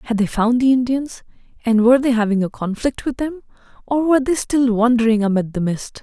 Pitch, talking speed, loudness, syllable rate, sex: 240 Hz, 210 wpm, -18 LUFS, 5.8 syllables/s, female